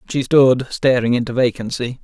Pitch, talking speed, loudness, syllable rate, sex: 125 Hz, 145 wpm, -17 LUFS, 5.0 syllables/s, male